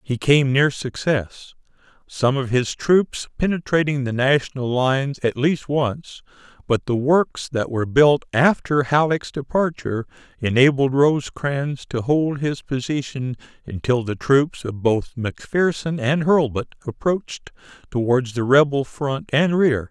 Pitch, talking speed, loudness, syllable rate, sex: 135 Hz, 135 wpm, -20 LUFS, 4.2 syllables/s, male